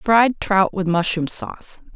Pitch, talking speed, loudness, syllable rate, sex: 190 Hz, 155 wpm, -19 LUFS, 3.9 syllables/s, female